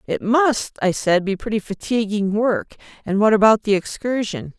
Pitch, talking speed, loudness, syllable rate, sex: 210 Hz, 170 wpm, -19 LUFS, 4.8 syllables/s, female